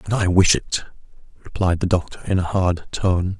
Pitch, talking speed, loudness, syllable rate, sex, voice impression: 90 Hz, 195 wpm, -20 LUFS, 4.8 syllables/s, male, very masculine, very adult-like, middle-aged, very thick, tensed, very powerful, bright, soft, slightly muffled, fluent, very raspy, very cool, intellectual, very sincere, calm, very mature, very friendly, reassuring, unique, very wild, slightly sweet, slightly lively, kind